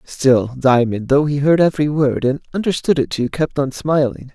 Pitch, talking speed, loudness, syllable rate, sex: 140 Hz, 195 wpm, -17 LUFS, 4.9 syllables/s, male